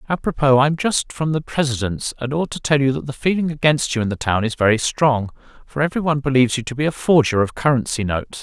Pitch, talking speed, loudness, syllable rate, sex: 135 Hz, 255 wpm, -19 LUFS, 6.4 syllables/s, male